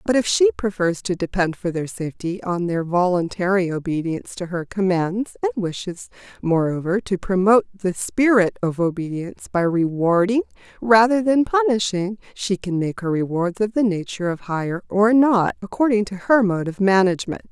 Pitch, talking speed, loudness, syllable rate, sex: 195 Hz, 165 wpm, -20 LUFS, 5.1 syllables/s, female